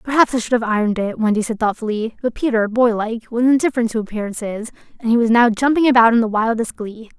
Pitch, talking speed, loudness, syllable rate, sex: 230 Hz, 215 wpm, -17 LUFS, 6.6 syllables/s, female